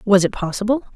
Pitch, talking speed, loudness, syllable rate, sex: 210 Hz, 190 wpm, -19 LUFS, 6.8 syllables/s, female